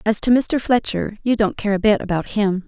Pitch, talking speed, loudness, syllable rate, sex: 215 Hz, 245 wpm, -19 LUFS, 5.2 syllables/s, female